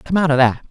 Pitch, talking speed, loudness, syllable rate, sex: 150 Hz, 340 wpm, -16 LUFS, 6.3 syllables/s, male